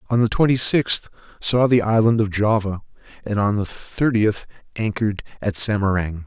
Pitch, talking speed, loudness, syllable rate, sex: 110 Hz, 155 wpm, -20 LUFS, 4.9 syllables/s, male